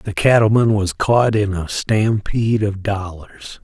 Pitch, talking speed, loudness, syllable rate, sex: 105 Hz, 150 wpm, -17 LUFS, 3.9 syllables/s, male